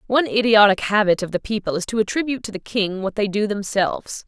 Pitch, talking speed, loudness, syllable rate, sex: 205 Hz, 225 wpm, -20 LUFS, 6.3 syllables/s, female